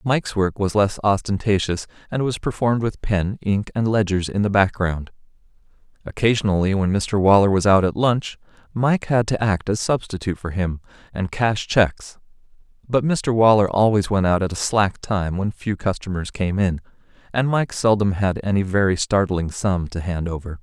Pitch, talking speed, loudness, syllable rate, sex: 100 Hz, 175 wpm, -20 LUFS, 5.0 syllables/s, male